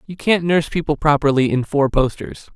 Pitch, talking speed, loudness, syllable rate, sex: 150 Hz, 190 wpm, -18 LUFS, 5.5 syllables/s, male